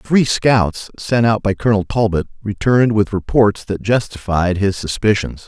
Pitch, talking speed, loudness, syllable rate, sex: 105 Hz, 155 wpm, -16 LUFS, 4.6 syllables/s, male